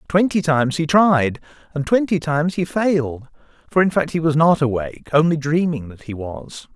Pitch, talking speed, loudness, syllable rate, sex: 155 Hz, 185 wpm, -19 LUFS, 5.2 syllables/s, male